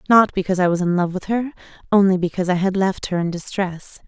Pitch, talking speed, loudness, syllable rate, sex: 190 Hz, 235 wpm, -20 LUFS, 6.4 syllables/s, female